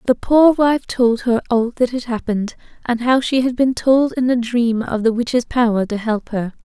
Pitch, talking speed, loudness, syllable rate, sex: 240 Hz, 225 wpm, -17 LUFS, 4.7 syllables/s, female